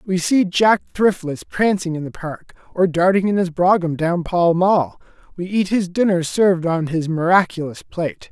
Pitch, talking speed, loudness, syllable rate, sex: 175 Hz, 180 wpm, -18 LUFS, 4.7 syllables/s, male